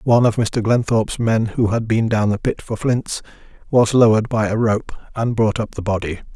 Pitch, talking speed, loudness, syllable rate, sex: 110 Hz, 215 wpm, -18 LUFS, 5.3 syllables/s, male